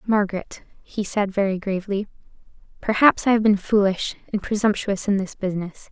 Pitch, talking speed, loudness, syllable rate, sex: 200 Hz, 150 wpm, -22 LUFS, 5.6 syllables/s, female